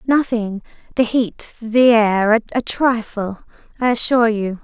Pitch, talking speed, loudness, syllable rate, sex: 230 Hz, 130 wpm, -17 LUFS, 3.8 syllables/s, female